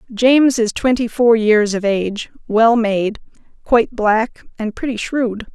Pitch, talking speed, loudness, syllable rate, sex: 225 Hz, 150 wpm, -16 LUFS, 4.2 syllables/s, female